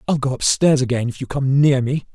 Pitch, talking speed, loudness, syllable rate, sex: 135 Hz, 250 wpm, -18 LUFS, 5.7 syllables/s, male